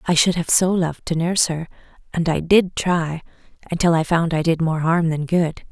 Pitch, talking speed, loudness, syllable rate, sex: 165 Hz, 220 wpm, -19 LUFS, 5.2 syllables/s, female